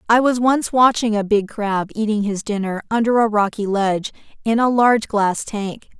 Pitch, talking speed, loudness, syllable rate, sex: 215 Hz, 190 wpm, -18 LUFS, 4.9 syllables/s, female